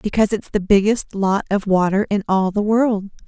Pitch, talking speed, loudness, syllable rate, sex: 200 Hz, 200 wpm, -18 LUFS, 5.1 syllables/s, female